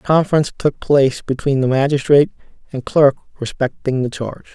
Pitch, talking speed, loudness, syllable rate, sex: 140 Hz, 145 wpm, -17 LUFS, 5.7 syllables/s, male